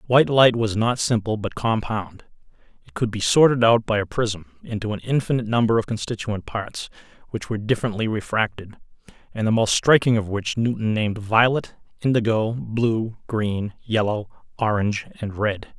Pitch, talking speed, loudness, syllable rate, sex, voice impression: 110 Hz, 160 wpm, -22 LUFS, 5.1 syllables/s, male, masculine, middle-aged, thick, powerful, muffled, raspy, cool, intellectual, mature, wild, slightly strict, slightly sharp